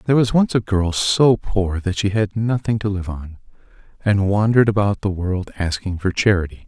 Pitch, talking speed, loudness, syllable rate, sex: 100 Hz, 200 wpm, -19 LUFS, 5.1 syllables/s, male